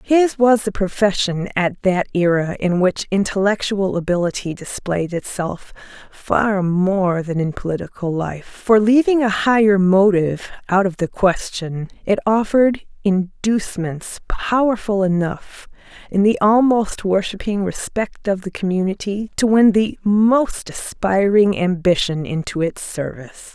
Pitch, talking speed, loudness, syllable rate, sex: 195 Hz, 125 wpm, -18 LUFS, 4.2 syllables/s, female